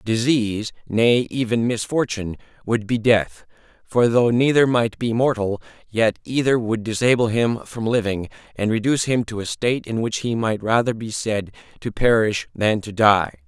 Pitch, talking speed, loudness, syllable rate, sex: 110 Hz, 170 wpm, -20 LUFS, 4.8 syllables/s, male